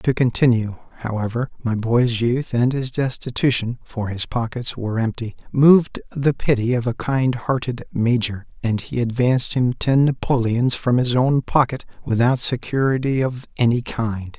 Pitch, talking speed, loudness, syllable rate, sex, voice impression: 120 Hz, 145 wpm, -20 LUFS, 4.6 syllables/s, male, masculine, adult-like, slightly thin, weak, slightly muffled, raspy, calm, reassuring, kind, modest